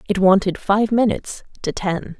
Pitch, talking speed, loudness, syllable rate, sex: 195 Hz, 165 wpm, -19 LUFS, 4.9 syllables/s, female